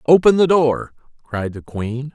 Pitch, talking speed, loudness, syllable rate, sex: 135 Hz, 170 wpm, -18 LUFS, 4.1 syllables/s, male